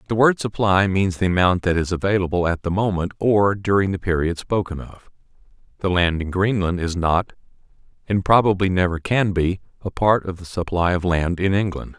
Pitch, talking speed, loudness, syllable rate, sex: 95 Hz, 190 wpm, -20 LUFS, 5.3 syllables/s, male